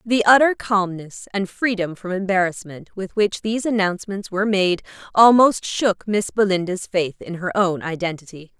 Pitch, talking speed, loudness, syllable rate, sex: 195 Hz, 155 wpm, -20 LUFS, 4.9 syllables/s, female